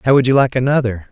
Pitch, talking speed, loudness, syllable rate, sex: 125 Hz, 270 wpm, -15 LUFS, 7.2 syllables/s, male